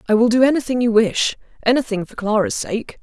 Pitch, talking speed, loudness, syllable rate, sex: 230 Hz, 180 wpm, -18 LUFS, 5.9 syllables/s, female